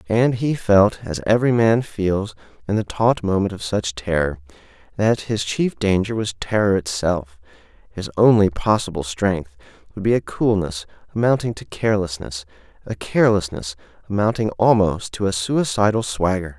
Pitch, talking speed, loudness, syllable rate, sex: 100 Hz, 145 wpm, -20 LUFS, 4.8 syllables/s, male